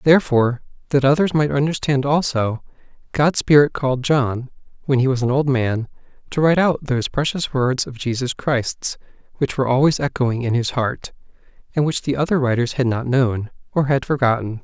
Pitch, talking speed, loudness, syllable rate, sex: 135 Hz, 175 wpm, -19 LUFS, 5.4 syllables/s, male